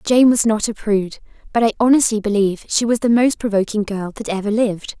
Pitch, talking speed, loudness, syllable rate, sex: 220 Hz, 215 wpm, -17 LUFS, 6.3 syllables/s, female